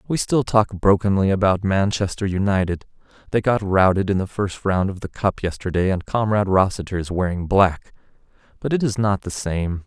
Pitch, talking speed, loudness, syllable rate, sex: 100 Hz, 170 wpm, -20 LUFS, 5.3 syllables/s, male